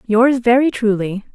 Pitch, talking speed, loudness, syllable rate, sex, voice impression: 230 Hz, 135 wpm, -15 LUFS, 4.2 syllables/s, female, feminine, adult-like, tensed, powerful, bright, clear, intellectual, friendly, elegant, lively